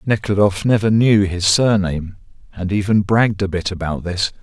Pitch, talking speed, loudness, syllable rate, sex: 100 Hz, 165 wpm, -17 LUFS, 5.2 syllables/s, male